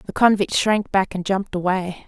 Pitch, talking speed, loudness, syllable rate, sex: 190 Hz, 205 wpm, -20 LUFS, 5.2 syllables/s, female